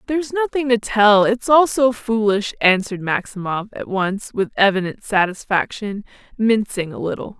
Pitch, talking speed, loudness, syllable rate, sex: 215 Hz, 145 wpm, -18 LUFS, 4.8 syllables/s, female